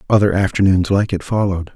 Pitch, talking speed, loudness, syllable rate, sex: 95 Hz, 170 wpm, -16 LUFS, 6.4 syllables/s, male